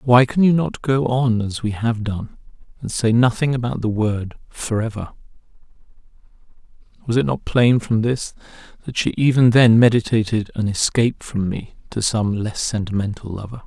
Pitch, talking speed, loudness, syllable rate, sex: 115 Hz, 160 wpm, -19 LUFS, 4.9 syllables/s, male